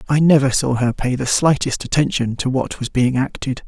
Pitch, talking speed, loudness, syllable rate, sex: 135 Hz, 215 wpm, -18 LUFS, 5.2 syllables/s, male